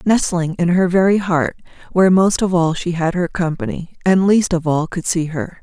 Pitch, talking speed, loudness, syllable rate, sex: 175 Hz, 215 wpm, -17 LUFS, 4.9 syllables/s, female